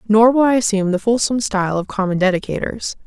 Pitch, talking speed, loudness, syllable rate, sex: 210 Hz, 195 wpm, -17 LUFS, 6.7 syllables/s, female